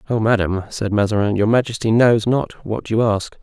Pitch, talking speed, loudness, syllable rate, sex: 110 Hz, 195 wpm, -18 LUFS, 5.4 syllables/s, male